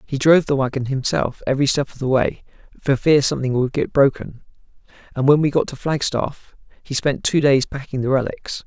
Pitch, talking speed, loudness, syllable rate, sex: 135 Hz, 200 wpm, -19 LUFS, 5.6 syllables/s, male